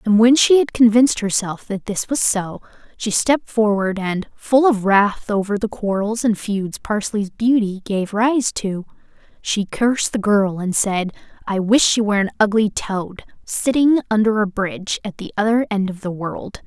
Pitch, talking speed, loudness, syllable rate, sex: 210 Hz, 185 wpm, -18 LUFS, 4.5 syllables/s, female